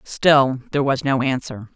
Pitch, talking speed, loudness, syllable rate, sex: 135 Hz, 170 wpm, -19 LUFS, 4.6 syllables/s, female